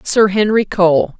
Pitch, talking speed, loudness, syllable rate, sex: 195 Hz, 150 wpm, -13 LUFS, 3.8 syllables/s, female